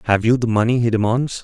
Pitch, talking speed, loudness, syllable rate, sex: 115 Hz, 250 wpm, -17 LUFS, 6.3 syllables/s, male